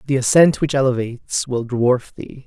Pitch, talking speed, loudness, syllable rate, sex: 130 Hz, 170 wpm, -18 LUFS, 4.8 syllables/s, male